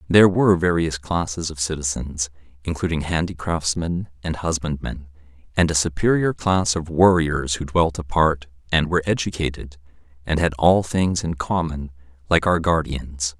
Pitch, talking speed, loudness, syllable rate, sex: 80 Hz, 140 wpm, -21 LUFS, 4.8 syllables/s, male